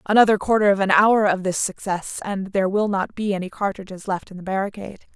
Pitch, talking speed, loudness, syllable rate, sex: 195 Hz, 220 wpm, -21 LUFS, 6.2 syllables/s, female